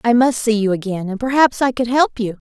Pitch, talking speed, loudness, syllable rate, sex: 230 Hz, 265 wpm, -17 LUFS, 5.7 syllables/s, female